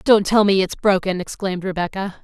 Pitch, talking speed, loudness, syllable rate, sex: 190 Hz, 190 wpm, -19 LUFS, 5.9 syllables/s, female